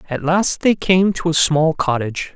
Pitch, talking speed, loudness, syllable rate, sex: 165 Hz, 205 wpm, -17 LUFS, 4.7 syllables/s, male